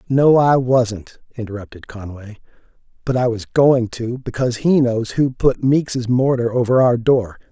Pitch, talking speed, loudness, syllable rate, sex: 120 Hz, 160 wpm, -17 LUFS, 4.4 syllables/s, male